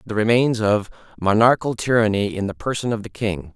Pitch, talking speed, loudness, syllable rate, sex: 110 Hz, 185 wpm, -20 LUFS, 5.8 syllables/s, male